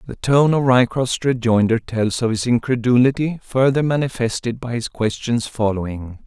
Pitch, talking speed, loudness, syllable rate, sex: 120 Hz, 145 wpm, -19 LUFS, 4.8 syllables/s, male